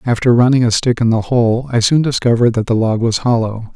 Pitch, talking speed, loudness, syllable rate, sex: 120 Hz, 240 wpm, -14 LUFS, 5.8 syllables/s, male